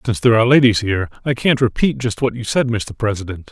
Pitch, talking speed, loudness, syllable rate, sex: 115 Hz, 240 wpm, -17 LUFS, 6.8 syllables/s, male